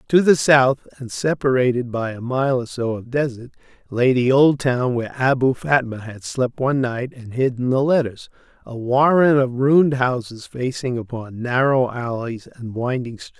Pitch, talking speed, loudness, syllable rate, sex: 125 Hz, 175 wpm, -19 LUFS, 4.7 syllables/s, male